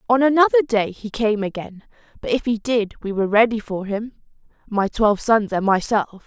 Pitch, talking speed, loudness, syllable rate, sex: 220 Hz, 190 wpm, -20 LUFS, 5.4 syllables/s, female